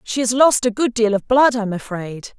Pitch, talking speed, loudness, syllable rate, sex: 230 Hz, 250 wpm, -17 LUFS, 4.9 syllables/s, female